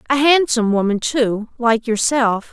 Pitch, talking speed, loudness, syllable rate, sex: 240 Hz, 145 wpm, -17 LUFS, 4.4 syllables/s, female